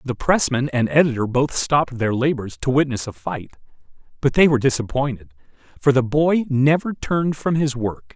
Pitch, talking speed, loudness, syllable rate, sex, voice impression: 135 Hz, 175 wpm, -20 LUFS, 5.2 syllables/s, male, masculine, adult-like, clear, slightly fluent, slightly intellectual, refreshing, sincere